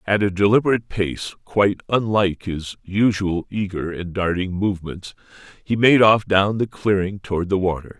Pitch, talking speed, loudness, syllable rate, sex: 100 Hz, 160 wpm, -20 LUFS, 5.1 syllables/s, male